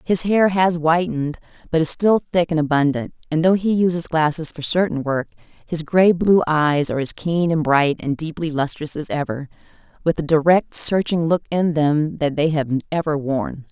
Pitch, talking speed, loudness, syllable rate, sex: 160 Hz, 195 wpm, -19 LUFS, 4.9 syllables/s, female